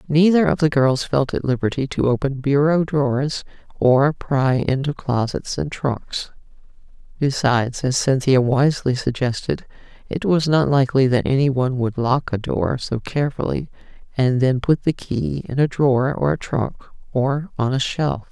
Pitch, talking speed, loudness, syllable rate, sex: 130 Hz, 160 wpm, -20 LUFS, 4.6 syllables/s, female